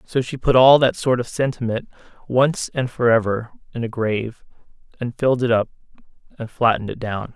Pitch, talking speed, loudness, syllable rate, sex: 120 Hz, 190 wpm, -20 LUFS, 5.5 syllables/s, male